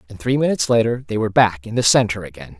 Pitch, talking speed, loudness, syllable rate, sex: 110 Hz, 255 wpm, -18 LUFS, 7.2 syllables/s, male